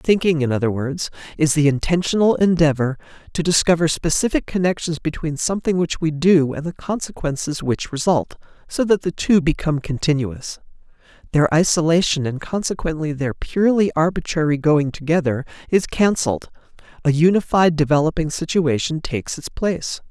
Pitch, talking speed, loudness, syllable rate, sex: 160 Hz, 135 wpm, -19 LUFS, 5.4 syllables/s, male